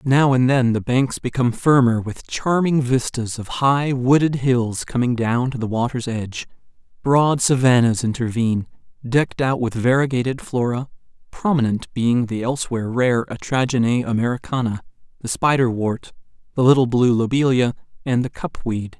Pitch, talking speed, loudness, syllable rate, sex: 125 Hz, 145 wpm, -19 LUFS, 4.9 syllables/s, male